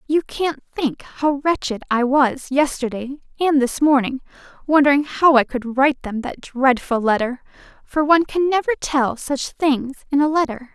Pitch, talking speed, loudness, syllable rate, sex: 275 Hz, 160 wpm, -19 LUFS, 4.6 syllables/s, female